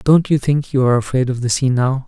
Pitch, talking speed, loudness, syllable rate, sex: 135 Hz, 290 wpm, -16 LUFS, 6.1 syllables/s, male